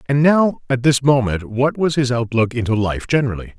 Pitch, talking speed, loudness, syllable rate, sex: 130 Hz, 200 wpm, -17 LUFS, 5.5 syllables/s, male